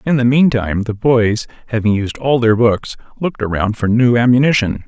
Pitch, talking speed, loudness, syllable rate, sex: 115 Hz, 185 wpm, -15 LUFS, 5.4 syllables/s, male